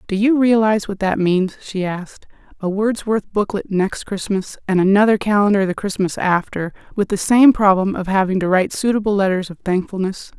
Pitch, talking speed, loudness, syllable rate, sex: 200 Hz, 180 wpm, -18 LUFS, 5.4 syllables/s, female